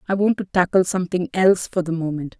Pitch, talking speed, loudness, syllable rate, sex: 180 Hz, 225 wpm, -20 LUFS, 6.4 syllables/s, female